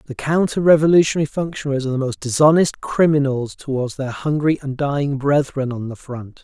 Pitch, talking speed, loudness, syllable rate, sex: 140 Hz, 170 wpm, -18 LUFS, 5.8 syllables/s, male